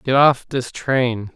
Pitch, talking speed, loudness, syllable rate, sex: 125 Hz, 175 wpm, -19 LUFS, 3.3 syllables/s, male